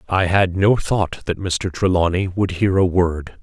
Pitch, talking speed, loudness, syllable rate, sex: 90 Hz, 195 wpm, -19 LUFS, 4.1 syllables/s, male